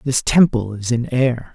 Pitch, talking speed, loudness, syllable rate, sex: 120 Hz, 195 wpm, -17 LUFS, 4.2 syllables/s, male